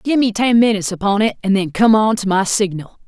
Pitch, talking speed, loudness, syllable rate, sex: 205 Hz, 255 wpm, -15 LUFS, 5.9 syllables/s, female